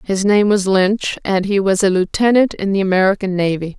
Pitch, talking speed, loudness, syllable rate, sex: 195 Hz, 205 wpm, -15 LUFS, 5.3 syllables/s, female